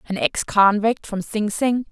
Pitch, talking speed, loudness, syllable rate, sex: 210 Hz, 190 wpm, -20 LUFS, 4.1 syllables/s, female